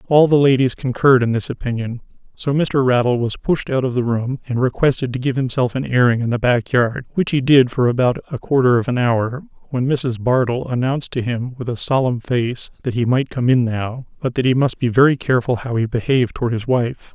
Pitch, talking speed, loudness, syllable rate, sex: 125 Hz, 230 wpm, -18 LUFS, 5.6 syllables/s, male